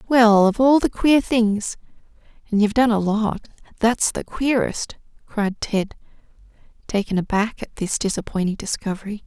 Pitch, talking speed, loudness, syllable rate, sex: 220 Hz, 130 wpm, -20 LUFS, 4.7 syllables/s, female